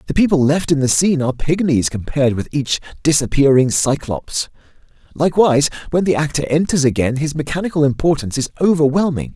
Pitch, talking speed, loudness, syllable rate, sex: 145 Hz, 155 wpm, -16 LUFS, 6.2 syllables/s, male